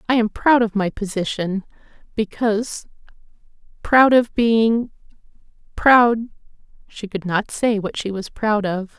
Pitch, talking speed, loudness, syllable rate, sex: 215 Hz, 135 wpm, -19 LUFS, 4.1 syllables/s, female